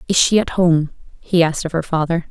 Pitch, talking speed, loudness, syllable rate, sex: 165 Hz, 235 wpm, -17 LUFS, 6.0 syllables/s, female